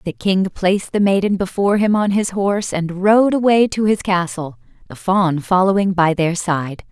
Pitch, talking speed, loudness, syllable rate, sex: 185 Hz, 190 wpm, -17 LUFS, 4.8 syllables/s, female